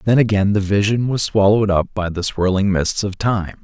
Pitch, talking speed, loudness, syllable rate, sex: 100 Hz, 215 wpm, -17 LUFS, 5.3 syllables/s, male